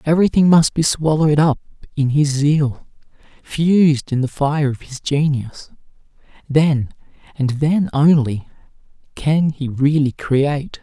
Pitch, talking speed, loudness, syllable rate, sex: 145 Hz, 120 wpm, -17 LUFS, 4.2 syllables/s, male